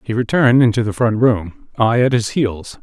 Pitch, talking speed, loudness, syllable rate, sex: 115 Hz, 190 wpm, -16 LUFS, 5.0 syllables/s, male